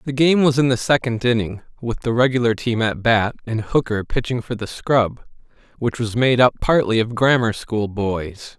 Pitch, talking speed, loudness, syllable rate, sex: 120 Hz, 195 wpm, -19 LUFS, 4.8 syllables/s, male